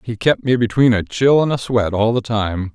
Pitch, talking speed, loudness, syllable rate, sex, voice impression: 115 Hz, 260 wpm, -17 LUFS, 4.9 syllables/s, male, masculine, middle-aged, thick, tensed, powerful, hard, fluent, intellectual, sincere, mature, wild, lively, strict